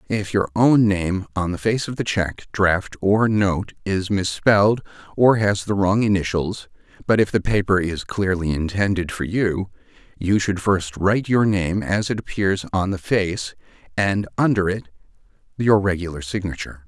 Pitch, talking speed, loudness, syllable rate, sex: 95 Hz, 165 wpm, -21 LUFS, 4.6 syllables/s, male